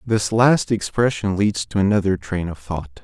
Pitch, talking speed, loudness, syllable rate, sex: 100 Hz, 180 wpm, -20 LUFS, 4.5 syllables/s, male